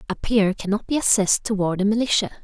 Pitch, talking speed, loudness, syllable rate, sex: 210 Hz, 195 wpm, -21 LUFS, 6.5 syllables/s, female